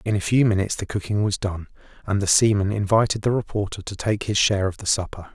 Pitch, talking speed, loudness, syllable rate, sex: 100 Hz, 235 wpm, -22 LUFS, 6.4 syllables/s, male